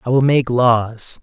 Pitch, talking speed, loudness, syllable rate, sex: 120 Hz, 195 wpm, -16 LUFS, 3.6 syllables/s, male